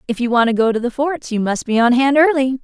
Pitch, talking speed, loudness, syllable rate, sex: 255 Hz, 320 wpm, -16 LUFS, 6.5 syllables/s, female